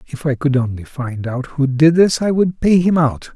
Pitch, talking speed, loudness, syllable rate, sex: 145 Hz, 250 wpm, -16 LUFS, 4.7 syllables/s, male